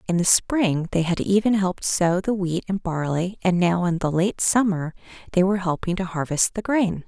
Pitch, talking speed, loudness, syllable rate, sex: 185 Hz, 210 wpm, -22 LUFS, 5.0 syllables/s, female